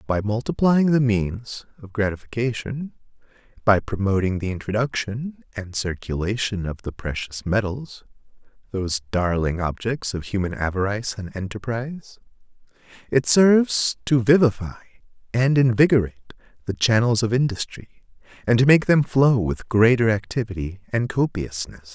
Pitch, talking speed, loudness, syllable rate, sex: 110 Hz, 120 wpm, -22 LUFS, 4.9 syllables/s, male